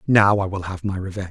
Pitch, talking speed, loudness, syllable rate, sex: 95 Hz, 275 wpm, -21 LUFS, 6.8 syllables/s, male